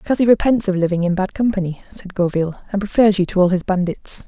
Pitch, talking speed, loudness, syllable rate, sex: 190 Hz, 240 wpm, -18 LUFS, 6.7 syllables/s, female